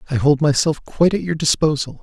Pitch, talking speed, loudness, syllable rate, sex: 150 Hz, 210 wpm, -18 LUFS, 6.1 syllables/s, male